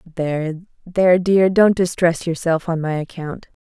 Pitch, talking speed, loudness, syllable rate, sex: 170 Hz, 150 wpm, -18 LUFS, 4.9 syllables/s, female